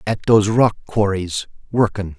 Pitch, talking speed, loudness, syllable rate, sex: 105 Hz, 110 wpm, -18 LUFS, 4.1 syllables/s, male